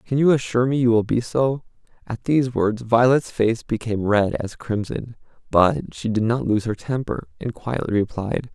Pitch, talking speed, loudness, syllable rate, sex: 115 Hz, 190 wpm, -21 LUFS, 4.9 syllables/s, male